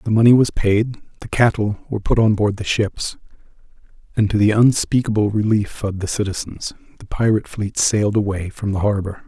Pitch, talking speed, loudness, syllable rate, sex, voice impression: 105 Hz, 180 wpm, -19 LUFS, 5.5 syllables/s, male, masculine, adult-like, relaxed, powerful, slightly soft, slightly muffled, intellectual, sincere, calm, reassuring, wild, slightly strict